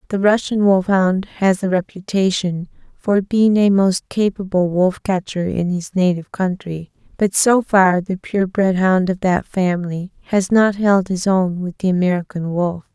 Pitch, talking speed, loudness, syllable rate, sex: 190 Hz, 165 wpm, -17 LUFS, 4.3 syllables/s, female